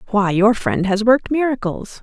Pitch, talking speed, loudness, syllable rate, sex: 215 Hz, 180 wpm, -17 LUFS, 5.0 syllables/s, female